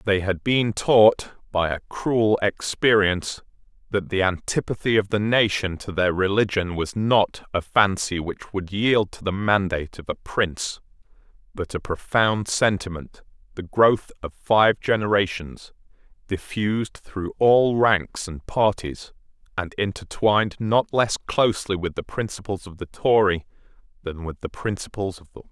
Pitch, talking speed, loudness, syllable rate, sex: 100 Hz, 150 wpm, -22 LUFS, 4.3 syllables/s, male